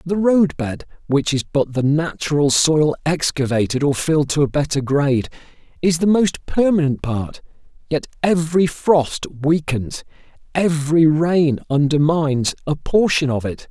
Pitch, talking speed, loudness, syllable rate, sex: 150 Hz, 135 wpm, -18 LUFS, 4.5 syllables/s, male